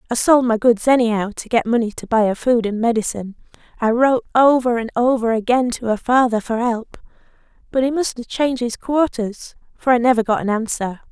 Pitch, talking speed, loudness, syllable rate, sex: 235 Hz, 210 wpm, -18 LUFS, 5.7 syllables/s, female